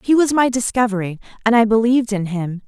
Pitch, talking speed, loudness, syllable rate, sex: 225 Hz, 200 wpm, -17 LUFS, 6.1 syllables/s, female